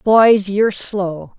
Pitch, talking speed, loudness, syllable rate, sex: 200 Hz, 130 wpm, -15 LUFS, 3.0 syllables/s, female